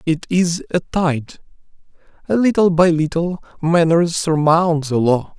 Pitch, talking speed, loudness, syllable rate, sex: 165 Hz, 125 wpm, -17 LUFS, 3.7 syllables/s, male